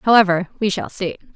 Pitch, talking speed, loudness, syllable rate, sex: 190 Hz, 180 wpm, -19 LUFS, 5.7 syllables/s, female